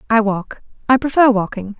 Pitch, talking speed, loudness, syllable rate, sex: 225 Hz, 165 wpm, -16 LUFS, 5.3 syllables/s, female